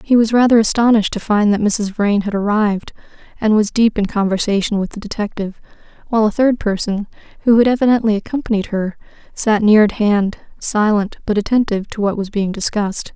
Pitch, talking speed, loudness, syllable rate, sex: 210 Hz, 180 wpm, -16 LUFS, 6.0 syllables/s, female